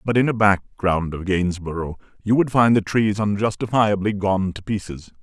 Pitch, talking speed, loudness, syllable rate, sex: 100 Hz, 170 wpm, -20 LUFS, 4.8 syllables/s, male